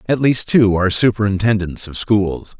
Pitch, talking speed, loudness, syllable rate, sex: 105 Hz, 160 wpm, -16 LUFS, 4.9 syllables/s, male